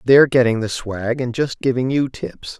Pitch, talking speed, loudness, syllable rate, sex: 125 Hz, 210 wpm, -19 LUFS, 4.9 syllables/s, male